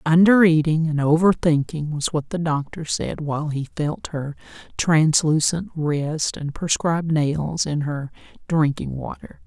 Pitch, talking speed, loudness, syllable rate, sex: 155 Hz, 145 wpm, -21 LUFS, 4.1 syllables/s, female